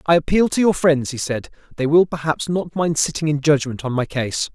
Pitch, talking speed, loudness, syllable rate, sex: 155 Hz, 235 wpm, -19 LUFS, 5.4 syllables/s, male